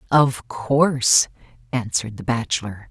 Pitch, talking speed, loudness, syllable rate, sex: 120 Hz, 105 wpm, -20 LUFS, 4.4 syllables/s, female